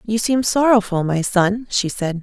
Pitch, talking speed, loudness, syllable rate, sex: 210 Hz, 190 wpm, -18 LUFS, 4.3 syllables/s, female